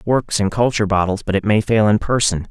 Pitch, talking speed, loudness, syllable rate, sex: 105 Hz, 265 wpm, -17 LUFS, 6.1 syllables/s, male